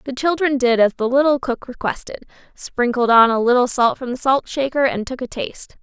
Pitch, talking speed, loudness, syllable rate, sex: 250 Hz, 215 wpm, -18 LUFS, 5.5 syllables/s, female